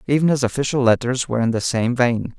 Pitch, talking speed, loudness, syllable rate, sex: 125 Hz, 225 wpm, -19 LUFS, 6.3 syllables/s, male